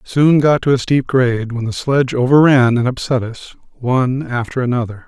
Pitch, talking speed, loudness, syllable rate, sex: 125 Hz, 190 wpm, -15 LUFS, 5.3 syllables/s, male